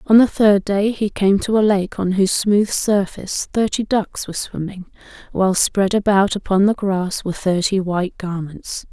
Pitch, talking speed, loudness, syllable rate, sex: 195 Hz, 180 wpm, -18 LUFS, 4.8 syllables/s, female